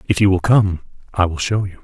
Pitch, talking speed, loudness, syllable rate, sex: 95 Hz, 260 wpm, -17 LUFS, 5.9 syllables/s, male